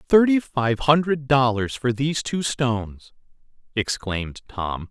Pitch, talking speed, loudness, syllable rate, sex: 130 Hz, 120 wpm, -22 LUFS, 4.2 syllables/s, male